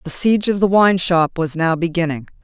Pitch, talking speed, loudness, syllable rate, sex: 175 Hz, 220 wpm, -17 LUFS, 5.5 syllables/s, female